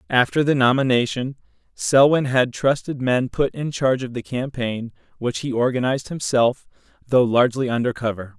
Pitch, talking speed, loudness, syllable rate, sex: 125 Hz, 150 wpm, -20 LUFS, 5.2 syllables/s, male